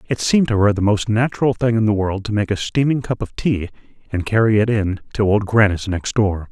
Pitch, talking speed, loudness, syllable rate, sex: 105 Hz, 250 wpm, -18 LUFS, 5.7 syllables/s, male